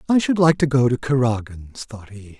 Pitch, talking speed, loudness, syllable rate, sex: 125 Hz, 225 wpm, -18 LUFS, 5.0 syllables/s, male